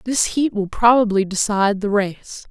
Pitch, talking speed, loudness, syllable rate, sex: 210 Hz, 170 wpm, -18 LUFS, 4.6 syllables/s, female